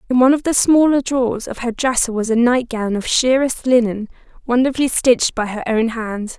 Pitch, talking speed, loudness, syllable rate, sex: 240 Hz, 195 wpm, -17 LUFS, 5.5 syllables/s, female